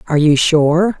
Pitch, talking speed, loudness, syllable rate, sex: 160 Hz, 180 wpm, -13 LUFS, 4.8 syllables/s, female